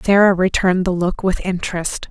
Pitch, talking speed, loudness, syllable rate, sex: 185 Hz, 170 wpm, -17 LUFS, 5.6 syllables/s, female